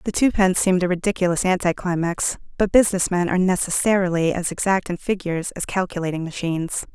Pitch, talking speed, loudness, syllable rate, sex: 180 Hz, 165 wpm, -21 LUFS, 6.5 syllables/s, female